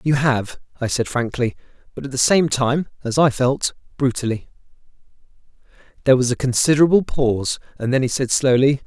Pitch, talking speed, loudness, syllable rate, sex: 130 Hz, 165 wpm, -19 LUFS, 5.6 syllables/s, male